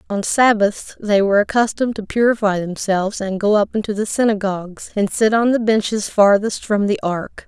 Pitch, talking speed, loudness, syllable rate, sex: 210 Hz, 185 wpm, -17 LUFS, 5.3 syllables/s, female